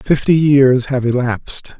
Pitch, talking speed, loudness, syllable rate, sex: 130 Hz, 135 wpm, -14 LUFS, 4.0 syllables/s, male